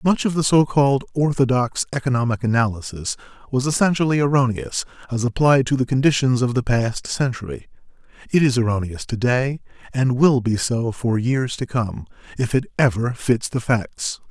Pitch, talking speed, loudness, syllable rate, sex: 125 Hz, 160 wpm, -20 LUFS, 5.1 syllables/s, male